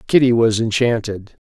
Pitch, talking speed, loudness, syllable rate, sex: 115 Hz, 120 wpm, -16 LUFS, 4.8 syllables/s, male